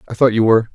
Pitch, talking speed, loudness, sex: 115 Hz, 325 wpm, -14 LUFS, male